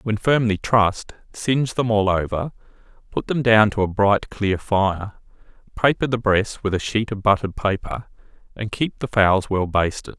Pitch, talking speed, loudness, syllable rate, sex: 105 Hz, 175 wpm, -20 LUFS, 4.7 syllables/s, male